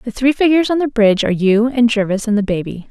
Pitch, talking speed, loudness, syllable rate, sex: 230 Hz, 270 wpm, -15 LUFS, 6.8 syllables/s, female